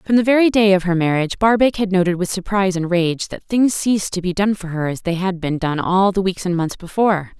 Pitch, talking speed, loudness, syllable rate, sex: 190 Hz, 270 wpm, -18 LUFS, 6.0 syllables/s, female